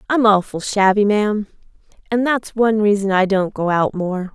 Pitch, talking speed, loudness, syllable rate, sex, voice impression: 205 Hz, 180 wpm, -17 LUFS, 5.1 syllables/s, female, very feminine, young, thin, tensed, powerful, bright, slightly soft, clear, slightly fluent, cute, intellectual, refreshing, very sincere, calm, friendly, reassuring, slightly unique, slightly elegant, slightly wild, sweet, lively, slightly strict, slightly intense, sharp